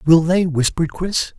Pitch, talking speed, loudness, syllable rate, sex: 165 Hz, 175 wpm, -18 LUFS, 4.9 syllables/s, male